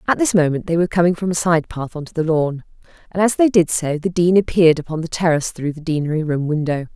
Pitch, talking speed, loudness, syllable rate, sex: 165 Hz, 260 wpm, -18 LUFS, 6.5 syllables/s, female